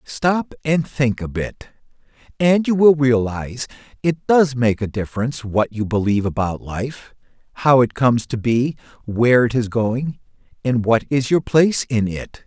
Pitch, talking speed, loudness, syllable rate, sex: 125 Hz, 170 wpm, -19 LUFS, 4.6 syllables/s, male